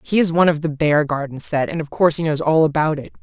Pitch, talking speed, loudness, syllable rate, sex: 155 Hz, 280 wpm, -18 LUFS, 6.6 syllables/s, female